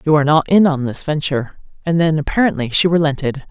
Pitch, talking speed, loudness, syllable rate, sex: 150 Hz, 205 wpm, -16 LUFS, 6.6 syllables/s, female